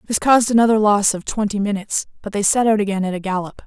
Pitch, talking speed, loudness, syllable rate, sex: 205 Hz, 245 wpm, -18 LUFS, 6.9 syllables/s, female